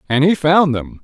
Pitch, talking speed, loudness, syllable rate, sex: 155 Hz, 230 wpm, -14 LUFS, 4.7 syllables/s, male